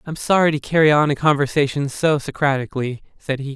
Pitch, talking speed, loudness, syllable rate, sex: 145 Hz, 185 wpm, -19 LUFS, 6.0 syllables/s, male